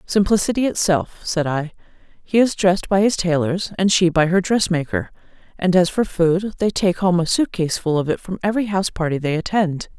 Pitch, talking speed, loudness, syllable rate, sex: 180 Hz, 205 wpm, -19 LUFS, 5.3 syllables/s, female